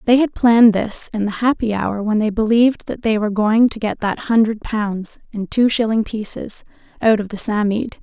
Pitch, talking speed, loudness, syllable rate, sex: 220 Hz, 210 wpm, -17 LUFS, 5.1 syllables/s, female